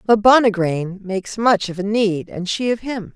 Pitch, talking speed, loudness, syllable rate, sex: 205 Hz, 170 wpm, -18 LUFS, 5.1 syllables/s, female